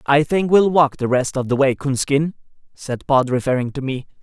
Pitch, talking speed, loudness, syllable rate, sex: 140 Hz, 215 wpm, -18 LUFS, 5.0 syllables/s, male